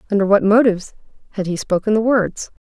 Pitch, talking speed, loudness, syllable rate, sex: 205 Hz, 180 wpm, -17 LUFS, 6.4 syllables/s, female